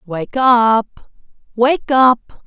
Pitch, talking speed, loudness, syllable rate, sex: 240 Hz, 95 wpm, -14 LUFS, 2.1 syllables/s, female